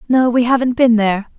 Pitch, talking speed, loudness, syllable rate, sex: 240 Hz, 215 wpm, -14 LUFS, 6.0 syllables/s, female